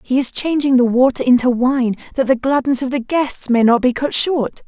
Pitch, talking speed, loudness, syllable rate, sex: 255 Hz, 230 wpm, -16 LUFS, 5.1 syllables/s, female